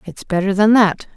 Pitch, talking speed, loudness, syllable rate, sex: 200 Hz, 205 wpm, -15 LUFS, 5.0 syllables/s, female